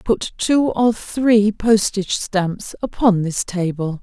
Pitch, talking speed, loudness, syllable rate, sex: 205 Hz, 135 wpm, -18 LUFS, 3.4 syllables/s, female